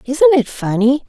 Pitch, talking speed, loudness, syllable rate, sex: 255 Hz, 165 wpm, -14 LUFS, 4.3 syllables/s, female